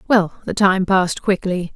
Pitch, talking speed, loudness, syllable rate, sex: 190 Hz, 170 wpm, -18 LUFS, 4.6 syllables/s, female